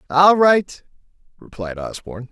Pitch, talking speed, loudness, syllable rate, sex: 145 Hz, 105 wpm, -17 LUFS, 4.5 syllables/s, male